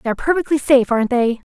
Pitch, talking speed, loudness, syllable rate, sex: 260 Hz, 235 wpm, -16 LUFS, 8.2 syllables/s, female